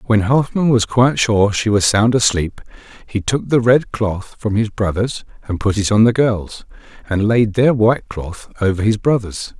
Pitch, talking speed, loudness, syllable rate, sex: 110 Hz, 195 wpm, -16 LUFS, 4.6 syllables/s, male